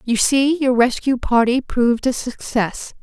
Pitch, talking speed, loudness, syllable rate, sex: 245 Hz, 160 wpm, -18 LUFS, 4.2 syllables/s, female